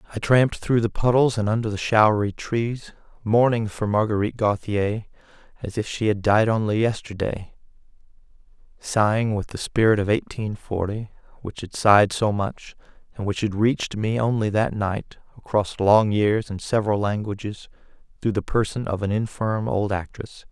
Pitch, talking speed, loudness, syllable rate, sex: 105 Hz, 160 wpm, -22 LUFS, 5.0 syllables/s, male